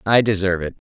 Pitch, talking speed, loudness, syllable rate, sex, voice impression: 100 Hz, 205 wpm, -19 LUFS, 7.6 syllables/s, male, very masculine, very adult-like, very middle-aged, very thick, tensed, very powerful, dark, very hard, clear, very fluent, cool, very intellectual, very sincere, very calm, mature, friendly, very reassuring, very unique, elegant, wild, sweet, kind, slightly modest